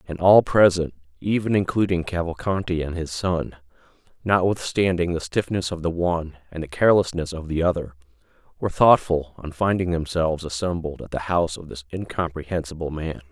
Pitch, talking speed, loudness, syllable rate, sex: 85 Hz, 155 wpm, -22 LUFS, 5.6 syllables/s, male